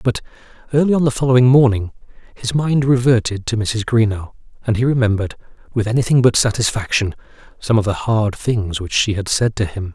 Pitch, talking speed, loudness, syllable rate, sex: 115 Hz, 180 wpm, -17 LUFS, 5.7 syllables/s, male